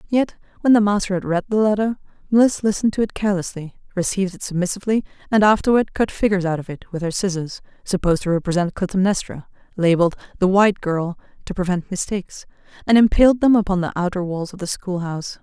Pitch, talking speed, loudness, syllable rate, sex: 190 Hz, 185 wpm, -20 LUFS, 6.6 syllables/s, female